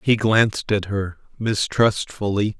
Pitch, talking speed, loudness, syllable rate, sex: 105 Hz, 115 wpm, -21 LUFS, 3.9 syllables/s, male